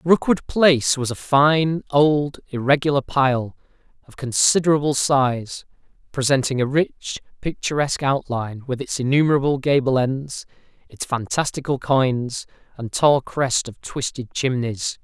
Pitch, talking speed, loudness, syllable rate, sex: 135 Hz, 120 wpm, -20 LUFS, 4.4 syllables/s, male